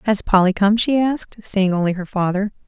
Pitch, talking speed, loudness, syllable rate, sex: 200 Hz, 200 wpm, -18 LUFS, 5.5 syllables/s, female